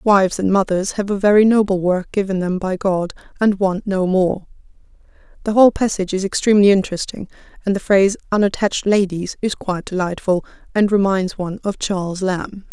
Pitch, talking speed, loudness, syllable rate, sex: 195 Hz, 170 wpm, -18 LUFS, 5.8 syllables/s, female